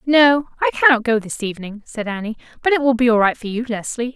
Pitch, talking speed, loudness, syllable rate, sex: 235 Hz, 245 wpm, -18 LUFS, 6.2 syllables/s, female